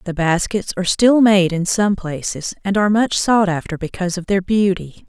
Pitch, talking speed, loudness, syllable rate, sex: 195 Hz, 200 wpm, -17 LUFS, 5.2 syllables/s, female